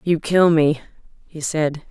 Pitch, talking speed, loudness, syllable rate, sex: 155 Hz, 155 wpm, -19 LUFS, 3.7 syllables/s, female